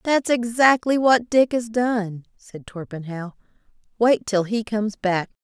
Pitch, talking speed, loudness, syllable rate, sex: 220 Hz, 145 wpm, -20 LUFS, 4.0 syllables/s, female